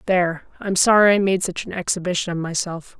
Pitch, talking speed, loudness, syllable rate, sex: 185 Hz, 200 wpm, -20 LUFS, 5.9 syllables/s, female